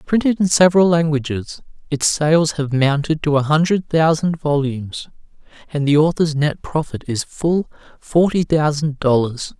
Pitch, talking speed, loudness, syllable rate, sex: 155 Hz, 145 wpm, -17 LUFS, 4.6 syllables/s, male